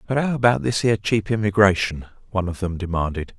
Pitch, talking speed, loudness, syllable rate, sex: 100 Hz, 195 wpm, -21 LUFS, 6.1 syllables/s, male